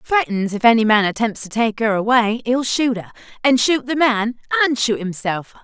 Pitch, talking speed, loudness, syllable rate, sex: 230 Hz, 200 wpm, -18 LUFS, 5.1 syllables/s, female